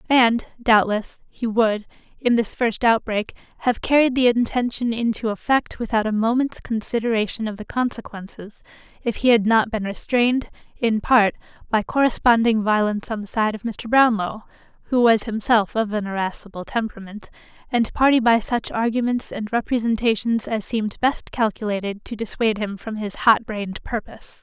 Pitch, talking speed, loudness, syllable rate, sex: 225 Hz, 155 wpm, -21 LUFS, 5.2 syllables/s, female